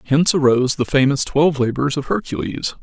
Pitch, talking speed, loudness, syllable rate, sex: 140 Hz, 170 wpm, -18 LUFS, 6.1 syllables/s, male